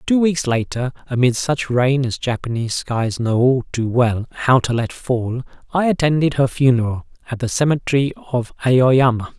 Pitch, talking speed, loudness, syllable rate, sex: 125 Hz, 165 wpm, -18 LUFS, 4.9 syllables/s, male